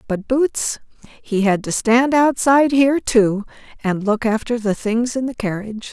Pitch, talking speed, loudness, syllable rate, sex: 235 Hz, 170 wpm, -18 LUFS, 4.6 syllables/s, female